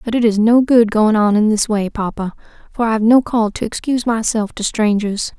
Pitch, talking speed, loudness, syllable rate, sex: 220 Hz, 225 wpm, -15 LUFS, 5.3 syllables/s, female